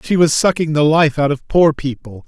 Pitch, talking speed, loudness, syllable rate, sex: 150 Hz, 240 wpm, -15 LUFS, 5.1 syllables/s, male